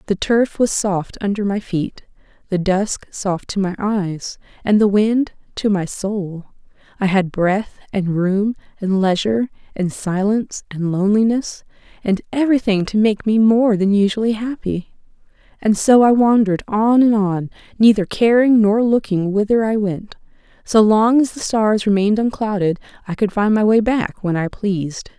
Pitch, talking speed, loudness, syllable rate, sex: 205 Hz, 165 wpm, -17 LUFS, 4.6 syllables/s, female